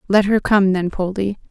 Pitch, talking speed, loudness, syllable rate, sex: 195 Hz, 200 wpm, -18 LUFS, 4.9 syllables/s, female